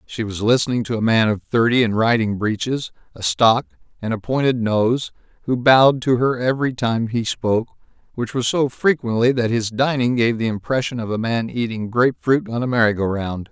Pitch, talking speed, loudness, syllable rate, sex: 120 Hz, 205 wpm, -19 LUFS, 5.3 syllables/s, male